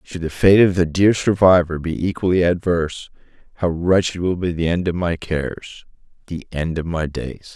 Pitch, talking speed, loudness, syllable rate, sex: 85 Hz, 190 wpm, -19 LUFS, 4.9 syllables/s, male